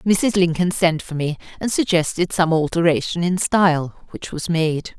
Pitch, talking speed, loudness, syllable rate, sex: 170 Hz, 170 wpm, -19 LUFS, 4.5 syllables/s, female